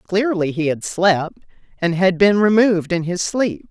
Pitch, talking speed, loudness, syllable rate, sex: 185 Hz, 180 wpm, -17 LUFS, 4.4 syllables/s, female